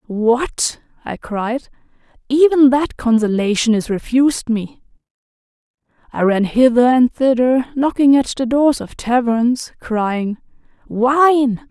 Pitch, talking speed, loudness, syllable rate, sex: 250 Hz, 115 wpm, -16 LUFS, 3.7 syllables/s, female